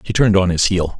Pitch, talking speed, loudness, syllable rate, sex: 95 Hz, 300 wpm, -15 LUFS, 6.8 syllables/s, male